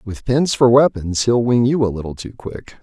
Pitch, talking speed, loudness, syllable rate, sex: 115 Hz, 255 wpm, -16 LUFS, 5.1 syllables/s, male